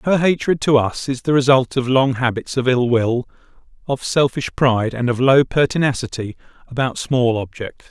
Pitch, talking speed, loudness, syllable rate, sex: 130 Hz, 175 wpm, -18 LUFS, 5.0 syllables/s, male